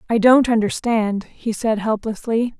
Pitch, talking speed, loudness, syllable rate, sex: 225 Hz, 140 wpm, -19 LUFS, 4.4 syllables/s, female